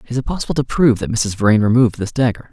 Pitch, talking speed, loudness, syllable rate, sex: 115 Hz, 260 wpm, -16 LUFS, 7.2 syllables/s, male